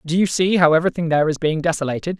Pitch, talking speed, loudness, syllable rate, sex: 165 Hz, 245 wpm, -18 LUFS, 7.5 syllables/s, male